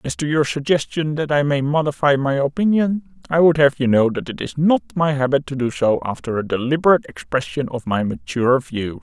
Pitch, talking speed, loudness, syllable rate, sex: 140 Hz, 215 wpm, -19 LUFS, 5.7 syllables/s, male